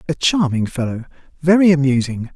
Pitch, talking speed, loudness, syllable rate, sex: 145 Hz, 125 wpm, -17 LUFS, 5.6 syllables/s, male